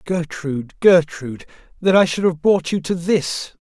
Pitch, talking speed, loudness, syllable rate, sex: 170 Hz, 150 wpm, -18 LUFS, 4.5 syllables/s, male